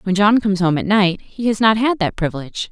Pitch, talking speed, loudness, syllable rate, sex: 200 Hz, 265 wpm, -17 LUFS, 6.2 syllables/s, female